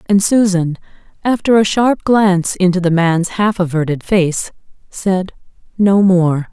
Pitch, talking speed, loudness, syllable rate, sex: 190 Hz, 140 wpm, -14 LUFS, 4.1 syllables/s, female